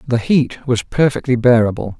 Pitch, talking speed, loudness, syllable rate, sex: 125 Hz, 150 wpm, -16 LUFS, 4.9 syllables/s, male